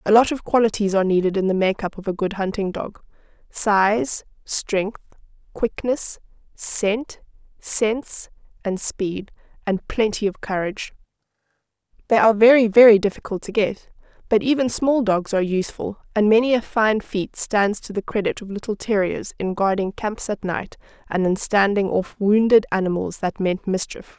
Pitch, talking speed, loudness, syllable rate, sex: 205 Hz, 155 wpm, -21 LUFS, 4.8 syllables/s, female